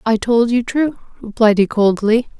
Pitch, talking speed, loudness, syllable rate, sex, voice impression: 225 Hz, 175 wpm, -15 LUFS, 4.5 syllables/s, female, very feminine, adult-like, slightly clear, intellectual, slightly lively